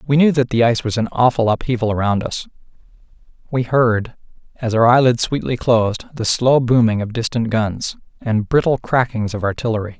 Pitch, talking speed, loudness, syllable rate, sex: 120 Hz, 175 wpm, -17 LUFS, 5.4 syllables/s, male